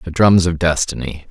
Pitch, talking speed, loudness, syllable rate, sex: 85 Hz, 185 wpm, -15 LUFS, 5.1 syllables/s, male